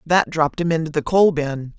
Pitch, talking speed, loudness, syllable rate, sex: 160 Hz, 235 wpm, -19 LUFS, 5.4 syllables/s, male